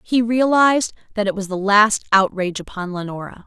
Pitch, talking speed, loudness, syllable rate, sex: 210 Hz, 175 wpm, -18 LUFS, 5.6 syllables/s, female